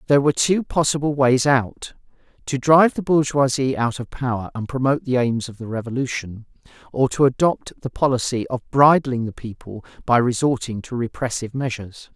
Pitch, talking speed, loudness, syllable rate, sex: 130 Hz, 170 wpm, -20 LUFS, 5.6 syllables/s, male